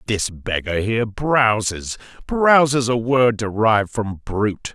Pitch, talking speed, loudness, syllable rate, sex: 115 Hz, 125 wpm, -19 LUFS, 4.0 syllables/s, male